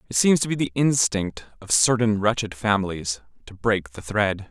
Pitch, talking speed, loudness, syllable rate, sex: 105 Hz, 185 wpm, -22 LUFS, 4.8 syllables/s, male